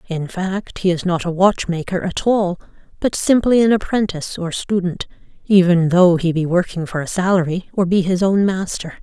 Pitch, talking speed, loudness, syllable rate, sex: 180 Hz, 185 wpm, -17 LUFS, 5.0 syllables/s, female